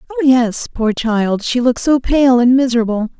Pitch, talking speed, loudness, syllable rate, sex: 240 Hz, 190 wpm, -14 LUFS, 4.6 syllables/s, female